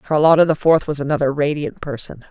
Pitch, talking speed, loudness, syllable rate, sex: 145 Hz, 180 wpm, -17 LUFS, 6.2 syllables/s, female